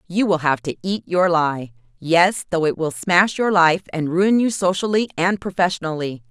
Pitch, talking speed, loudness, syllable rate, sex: 175 Hz, 180 wpm, -19 LUFS, 4.6 syllables/s, female